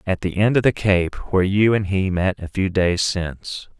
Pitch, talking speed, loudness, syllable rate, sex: 95 Hz, 235 wpm, -20 LUFS, 4.7 syllables/s, male